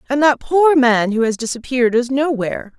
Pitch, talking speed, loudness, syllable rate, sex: 255 Hz, 195 wpm, -16 LUFS, 5.5 syllables/s, female